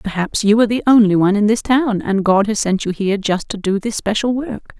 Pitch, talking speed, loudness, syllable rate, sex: 210 Hz, 265 wpm, -16 LUFS, 5.8 syllables/s, female